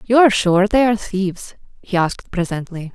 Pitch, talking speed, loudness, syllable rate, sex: 200 Hz, 185 wpm, -17 LUFS, 5.8 syllables/s, female